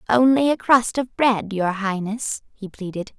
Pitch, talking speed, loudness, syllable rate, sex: 220 Hz, 170 wpm, -20 LUFS, 4.2 syllables/s, female